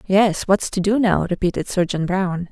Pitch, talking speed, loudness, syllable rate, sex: 190 Hz, 190 wpm, -19 LUFS, 4.7 syllables/s, female